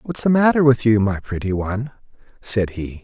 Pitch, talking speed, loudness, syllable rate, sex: 115 Hz, 200 wpm, -19 LUFS, 5.2 syllables/s, male